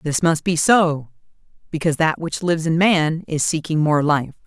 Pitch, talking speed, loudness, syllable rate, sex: 160 Hz, 190 wpm, -19 LUFS, 4.9 syllables/s, female